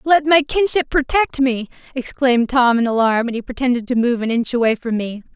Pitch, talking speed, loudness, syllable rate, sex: 255 Hz, 215 wpm, -17 LUFS, 5.5 syllables/s, female